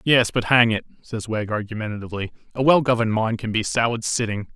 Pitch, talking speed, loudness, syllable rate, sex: 115 Hz, 200 wpm, -21 LUFS, 6.3 syllables/s, male